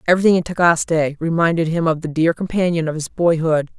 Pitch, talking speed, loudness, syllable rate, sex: 165 Hz, 190 wpm, -18 LUFS, 6.2 syllables/s, female